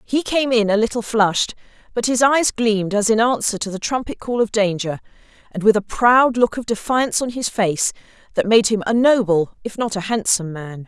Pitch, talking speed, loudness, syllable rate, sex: 220 Hz, 215 wpm, -18 LUFS, 5.4 syllables/s, female